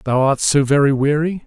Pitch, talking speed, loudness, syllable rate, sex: 145 Hz, 205 wpm, -16 LUFS, 5.2 syllables/s, male